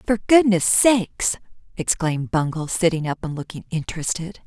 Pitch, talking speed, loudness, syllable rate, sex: 180 Hz, 135 wpm, -21 LUFS, 5.3 syllables/s, female